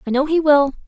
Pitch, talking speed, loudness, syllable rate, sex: 290 Hz, 275 wpm, -16 LUFS, 6.6 syllables/s, female